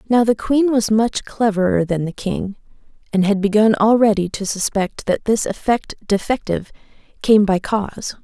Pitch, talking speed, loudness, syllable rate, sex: 210 Hz, 160 wpm, -18 LUFS, 4.8 syllables/s, female